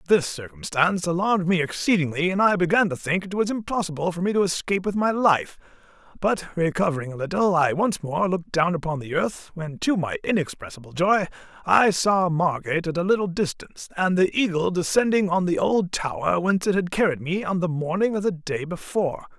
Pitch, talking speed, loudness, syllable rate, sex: 175 Hz, 200 wpm, -23 LUFS, 5.7 syllables/s, male